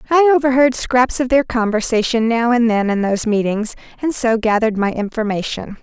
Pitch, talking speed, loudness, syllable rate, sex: 230 Hz, 175 wpm, -16 LUFS, 5.5 syllables/s, female